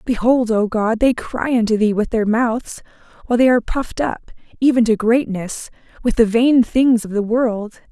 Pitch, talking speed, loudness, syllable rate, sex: 230 Hz, 190 wpm, -17 LUFS, 4.9 syllables/s, female